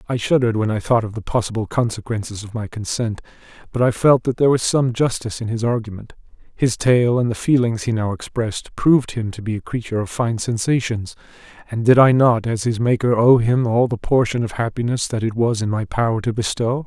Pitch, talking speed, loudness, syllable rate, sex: 115 Hz, 220 wpm, -19 LUFS, 5.8 syllables/s, male